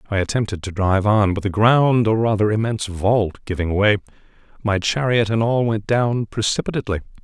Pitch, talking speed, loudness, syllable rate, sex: 105 Hz, 175 wpm, -19 LUFS, 5.6 syllables/s, male